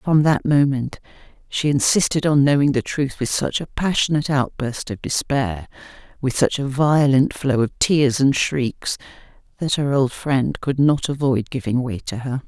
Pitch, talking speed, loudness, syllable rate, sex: 135 Hz, 175 wpm, -20 LUFS, 4.5 syllables/s, female